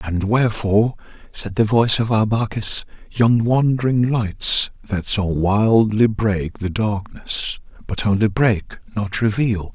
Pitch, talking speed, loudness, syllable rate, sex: 105 Hz, 130 wpm, -18 LUFS, 3.9 syllables/s, male